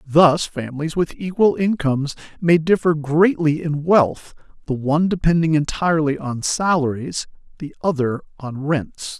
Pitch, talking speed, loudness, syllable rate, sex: 155 Hz, 130 wpm, -19 LUFS, 4.5 syllables/s, male